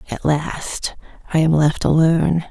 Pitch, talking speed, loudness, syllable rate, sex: 160 Hz, 145 wpm, -18 LUFS, 4.2 syllables/s, female